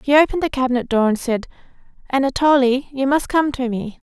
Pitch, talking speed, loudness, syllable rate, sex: 260 Hz, 190 wpm, -18 LUFS, 6.1 syllables/s, female